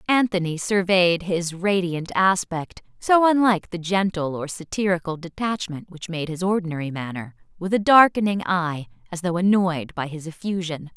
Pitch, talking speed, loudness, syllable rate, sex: 180 Hz, 135 wpm, -22 LUFS, 4.9 syllables/s, female